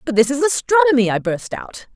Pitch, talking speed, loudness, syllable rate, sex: 265 Hz, 215 wpm, -17 LUFS, 5.6 syllables/s, female